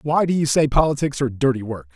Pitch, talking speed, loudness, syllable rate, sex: 135 Hz, 245 wpm, -20 LUFS, 6.6 syllables/s, male